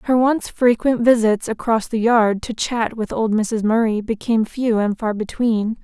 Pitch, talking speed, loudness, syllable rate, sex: 225 Hz, 185 wpm, -19 LUFS, 4.4 syllables/s, female